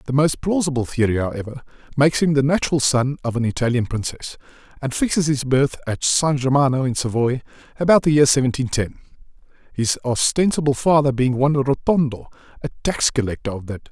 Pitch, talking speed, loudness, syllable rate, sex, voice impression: 135 Hz, 170 wpm, -19 LUFS, 6.1 syllables/s, male, masculine, adult-like, slightly thick, slightly fluent, cool, slightly intellectual, sincere